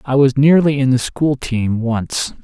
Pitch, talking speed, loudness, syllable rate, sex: 130 Hz, 195 wpm, -15 LUFS, 4.0 syllables/s, male